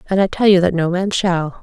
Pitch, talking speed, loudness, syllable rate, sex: 185 Hz, 295 wpm, -16 LUFS, 5.3 syllables/s, female